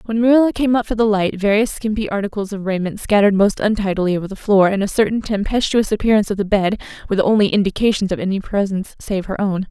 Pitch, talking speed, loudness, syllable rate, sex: 205 Hz, 225 wpm, -17 LUFS, 6.9 syllables/s, female